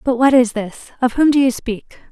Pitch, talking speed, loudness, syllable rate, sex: 250 Hz, 225 wpm, -16 LUFS, 4.9 syllables/s, female